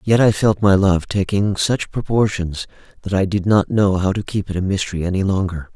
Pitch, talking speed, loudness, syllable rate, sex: 95 Hz, 220 wpm, -18 LUFS, 5.3 syllables/s, male